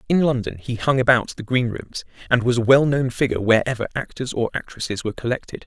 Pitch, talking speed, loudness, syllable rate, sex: 120 Hz, 200 wpm, -21 LUFS, 6.2 syllables/s, male